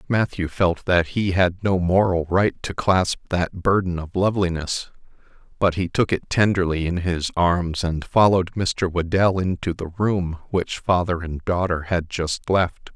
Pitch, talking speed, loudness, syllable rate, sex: 90 Hz, 165 wpm, -21 LUFS, 4.3 syllables/s, male